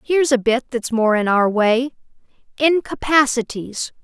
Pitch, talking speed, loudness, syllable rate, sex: 245 Hz, 135 wpm, -18 LUFS, 4.3 syllables/s, female